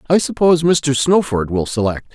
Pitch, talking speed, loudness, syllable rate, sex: 140 Hz, 170 wpm, -16 LUFS, 5.1 syllables/s, male